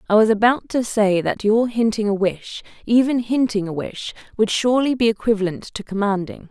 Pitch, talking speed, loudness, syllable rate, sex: 215 Hz, 185 wpm, -19 LUFS, 5.3 syllables/s, female